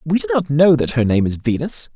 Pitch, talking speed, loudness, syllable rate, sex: 135 Hz, 275 wpm, -17 LUFS, 5.7 syllables/s, male